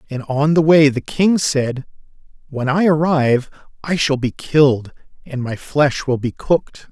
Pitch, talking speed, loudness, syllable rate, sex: 140 Hz, 175 wpm, -17 LUFS, 4.4 syllables/s, male